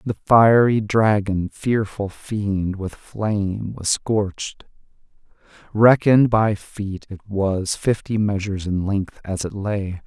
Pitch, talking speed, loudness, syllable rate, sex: 100 Hz, 125 wpm, -20 LUFS, 3.6 syllables/s, male